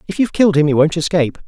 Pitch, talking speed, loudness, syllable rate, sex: 165 Hz, 285 wpm, -15 LUFS, 8.5 syllables/s, male